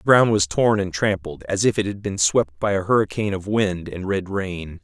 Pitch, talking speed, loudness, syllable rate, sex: 95 Hz, 250 wpm, -21 LUFS, 5.1 syllables/s, male